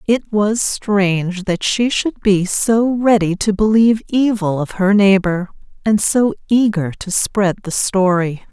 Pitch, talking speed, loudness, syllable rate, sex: 205 Hz, 155 wpm, -16 LUFS, 4.0 syllables/s, female